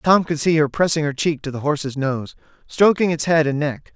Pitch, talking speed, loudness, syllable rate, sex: 155 Hz, 245 wpm, -19 LUFS, 5.3 syllables/s, male